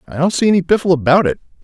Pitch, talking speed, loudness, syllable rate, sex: 160 Hz, 255 wpm, -14 LUFS, 7.8 syllables/s, male